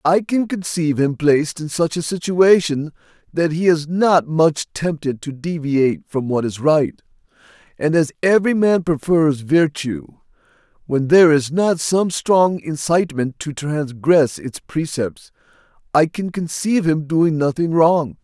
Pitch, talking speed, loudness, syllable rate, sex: 160 Hz, 150 wpm, -18 LUFS, 4.3 syllables/s, male